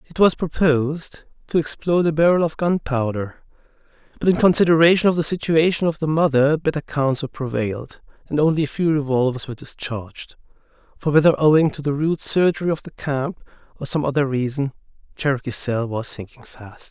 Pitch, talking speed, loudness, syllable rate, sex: 145 Hz, 165 wpm, -20 LUFS, 5.7 syllables/s, male